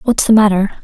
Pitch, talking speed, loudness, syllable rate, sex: 210 Hz, 215 wpm, -11 LUFS, 5.8 syllables/s, female